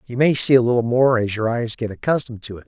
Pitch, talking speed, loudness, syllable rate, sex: 120 Hz, 290 wpm, -18 LUFS, 6.6 syllables/s, male